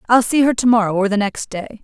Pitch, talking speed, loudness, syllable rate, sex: 220 Hz, 295 wpm, -16 LUFS, 6.1 syllables/s, female